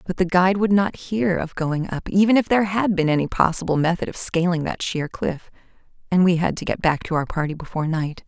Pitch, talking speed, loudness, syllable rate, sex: 175 Hz, 240 wpm, -21 LUFS, 5.9 syllables/s, female